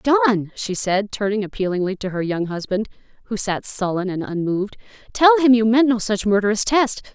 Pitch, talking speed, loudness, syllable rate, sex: 205 Hz, 185 wpm, -20 LUFS, 5.6 syllables/s, female